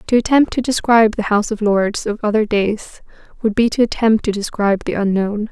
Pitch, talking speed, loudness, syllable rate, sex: 215 Hz, 205 wpm, -16 LUFS, 5.7 syllables/s, female